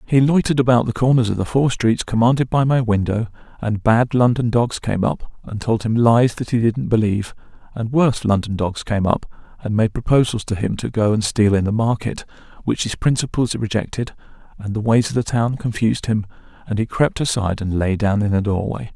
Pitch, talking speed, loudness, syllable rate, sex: 115 Hz, 210 wpm, -19 LUFS, 5.6 syllables/s, male